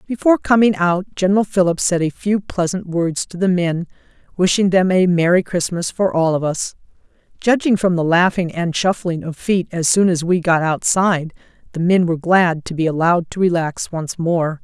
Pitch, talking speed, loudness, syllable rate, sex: 175 Hz, 195 wpm, -17 LUFS, 5.1 syllables/s, female